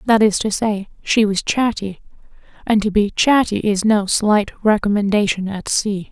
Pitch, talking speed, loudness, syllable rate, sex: 210 Hz, 165 wpm, -17 LUFS, 4.4 syllables/s, female